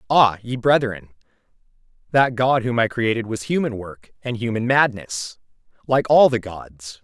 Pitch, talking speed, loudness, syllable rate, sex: 115 Hz, 155 wpm, -20 LUFS, 4.4 syllables/s, male